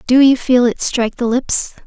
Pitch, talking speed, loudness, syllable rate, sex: 250 Hz, 225 wpm, -14 LUFS, 4.9 syllables/s, female